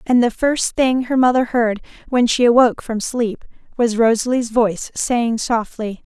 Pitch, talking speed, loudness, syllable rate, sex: 235 Hz, 165 wpm, -17 LUFS, 4.6 syllables/s, female